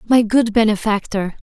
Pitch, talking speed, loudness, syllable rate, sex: 220 Hz, 120 wpm, -17 LUFS, 4.8 syllables/s, female